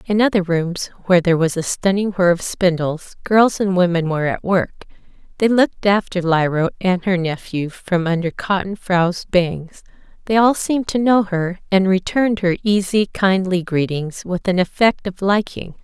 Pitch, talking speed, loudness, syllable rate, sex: 185 Hz, 175 wpm, -18 LUFS, 4.9 syllables/s, female